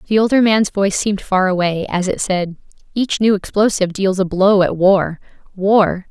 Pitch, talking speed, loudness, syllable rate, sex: 195 Hz, 175 wpm, -16 LUFS, 5.1 syllables/s, female